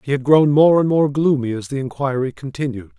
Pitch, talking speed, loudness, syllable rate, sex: 140 Hz, 220 wpm, -17 LUFS, 5.6 syllables/s, male